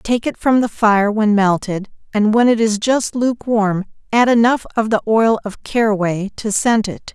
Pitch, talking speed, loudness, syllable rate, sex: 220 Hz, 195 wpm, -16 LUFS, 4.6 syllables/s, female